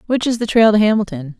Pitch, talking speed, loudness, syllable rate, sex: 210 Hz, 260 wpm, -15 LUFS, 6.5 syllables/s, female